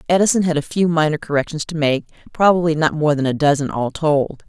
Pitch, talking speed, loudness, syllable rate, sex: 155 Hz, 215 wpm, -18 LUFS, 6.0 syllables/s, female